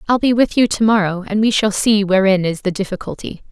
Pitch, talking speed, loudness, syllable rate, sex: 205 Hz, 240 wpm, -16 LUFS, 5.9 syllables/s, female